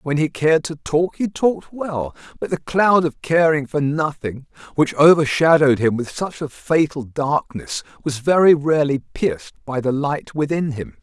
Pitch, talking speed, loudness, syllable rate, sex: 150 Hz, 175 wpm, -19 LUFS, 4.7 syllables/s, male